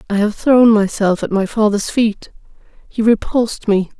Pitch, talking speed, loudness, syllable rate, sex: 215 Hz, 165 wpm, -15 LUFS, 4.7 syllables/s, female